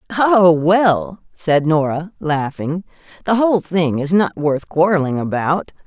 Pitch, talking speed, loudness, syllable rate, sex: 165 Hz, 135 wpm, -17 LUFS, 4.0 syllables/s, female